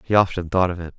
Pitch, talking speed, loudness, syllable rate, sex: 90 Hz, 305 wpm, -21 LUFS, 6.9 syllables/s, male